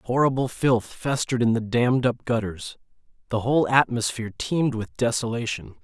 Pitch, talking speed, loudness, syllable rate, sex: 120 Hz, 145 wpm, -24 LUFS, 5.5 syllables/s, male